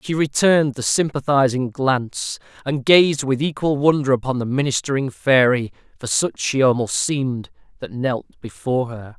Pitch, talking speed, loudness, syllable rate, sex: 130 Hz, 150 wpm, -19 LUFS, 4.9 syllables/s, male